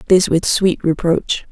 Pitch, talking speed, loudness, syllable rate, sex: 175 Hz, 160 wpm, -16 LUFS, 3.9 syllables/s, female